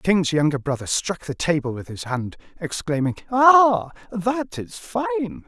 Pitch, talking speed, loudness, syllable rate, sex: 165 Hz, 165 wpm, -21 LUFS, 4.5 syllables/s, male